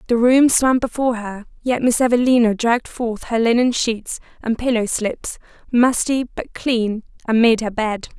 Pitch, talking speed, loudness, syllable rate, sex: 235 Hz, 170 wpm, -18 LUFS, 4.6 syllables/s, female